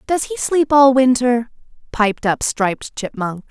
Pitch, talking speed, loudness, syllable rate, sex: 240 Hz, 155 wpm, -17 LUFS, 4.1 syllables/s, female